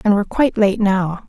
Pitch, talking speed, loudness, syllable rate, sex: 205 Hz, 235 wpm, -17 LUFS, 6.0 syllables/s, female